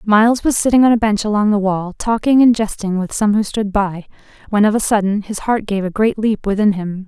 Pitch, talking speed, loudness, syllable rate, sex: 210 Hz, 245 wpm, -16 LUFS, 5.6 syllables/s, female